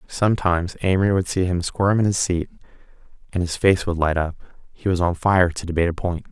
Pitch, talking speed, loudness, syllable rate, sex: 90 Hz, 220 wpm, -21 LUFS, 6.1 syllables/s, male